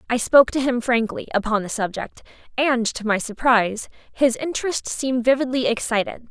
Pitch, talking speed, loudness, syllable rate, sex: 240 Hz, 160 wpm, -21 LUFS, 5.5 syllables/s, female